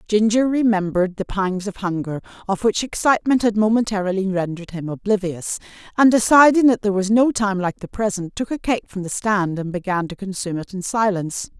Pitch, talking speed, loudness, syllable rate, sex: 200 Hz, 190 wpm, -20 LUFS, 5.8 syllables/s, female